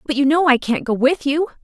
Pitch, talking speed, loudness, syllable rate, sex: 285 Hz, 295 wpm, -17 LUFS, 5.8 syllables/s, female